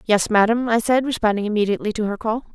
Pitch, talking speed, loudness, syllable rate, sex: 220 Hz, 210 wpm, -20 LUFS, 6.8 syllables/s, female